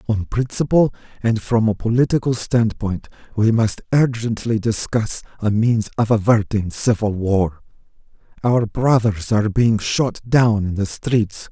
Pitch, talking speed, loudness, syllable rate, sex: 110 Hz, 135 wpm, -19 LUFS, 4.2 syllables/s, male